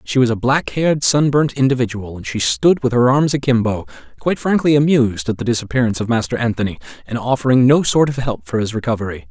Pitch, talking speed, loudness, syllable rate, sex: 120 Hz, 215 wpm, -17 LUFS, 6.4 syllables/s, male